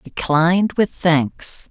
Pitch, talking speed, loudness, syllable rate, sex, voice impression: 170 Hz, 105 wpm, -18 LUFS, 3.1 syllables/s, female, gender-neutral, adult-like, clear, slightly refreshing, slightly unique, kind